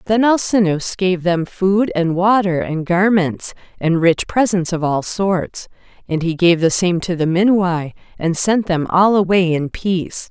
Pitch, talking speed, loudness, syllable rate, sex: 180 Hz, 175 wpm, -16 LUFS, 4.1 syllables/s, female